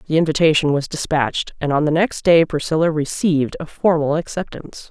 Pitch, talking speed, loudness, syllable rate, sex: 155 Hz, 170 wpm, -18 LUFS, 5.8 syllables/s, female